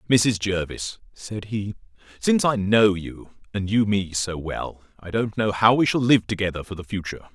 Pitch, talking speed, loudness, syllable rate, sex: 100 Hz, 195 wpm, -23 LUFS, 5.0 syllables/s, male